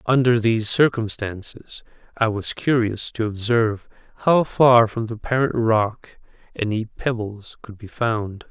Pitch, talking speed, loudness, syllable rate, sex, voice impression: 115 Hz, 135 wpm, -21 LUFS, 4.1 syllables/s, male, masculine, very adult-like, slightly thick, cool, slightly intellectual, sincere, calm, slightly mature